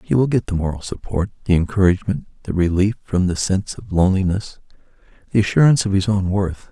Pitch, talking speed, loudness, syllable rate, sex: 95 Hz, 190 wpm, -19 LUFS, 6.4 syllables/s, male